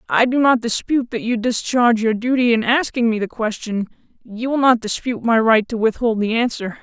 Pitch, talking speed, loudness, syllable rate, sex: 230 Hz, 210 wpm, -18 LUFS, 5.6 syllables/s, female